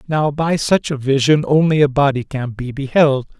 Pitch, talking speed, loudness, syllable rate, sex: 140 Hz, 195 wpm, -16 LUFS, 4.8 syllables/s, male